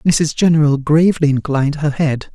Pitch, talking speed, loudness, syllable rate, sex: 150 Hz, 155 wpm, -15 LUFS, 5.3 syllables/s, female